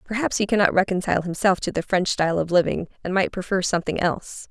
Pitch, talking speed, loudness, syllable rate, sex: 185 Hz, 215 wpm, -22 LUFS, 6.6 syllables/s, female